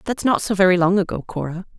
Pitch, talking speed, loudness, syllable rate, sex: 190 Hz, 235 wpm, -19 LUFS, 6.6 syllables/s, female